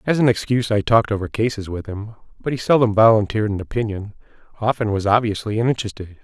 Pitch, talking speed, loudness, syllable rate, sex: 110 Hz, 185 wpm, -19 LUFS, 6.9 syllables/s, male